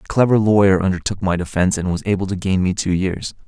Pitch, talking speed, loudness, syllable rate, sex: 95 Hz, 240 wpm, -18 LUFS, 6.7 syllables/s, male